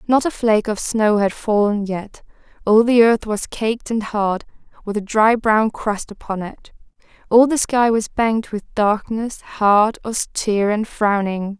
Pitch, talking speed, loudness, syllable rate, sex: 215 Hz, 170 wpm, -18 LUFS, 4.2 syllables/s, female